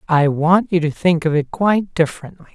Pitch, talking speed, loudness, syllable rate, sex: 170 Hz, 215 wpm, -17 LUFS, 5.6 syllables/s, male